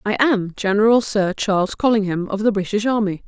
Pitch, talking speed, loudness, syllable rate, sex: 205 Hz, 185 wpm, -19 LUFS, 5.6 syllables/s, female